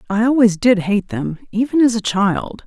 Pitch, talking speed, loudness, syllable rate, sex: 215 Hz, 205 wpm, -17 LUFS, 4.7 syllables/s, female